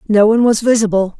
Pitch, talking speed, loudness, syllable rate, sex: 215 Hz, 200 wpm, -13 LUFS, 6.9 syllables/s, female